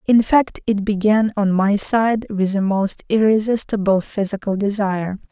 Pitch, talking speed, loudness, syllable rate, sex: 205 Hz, 145 wpm, -18 LUFS, 4.5 syllables/s, female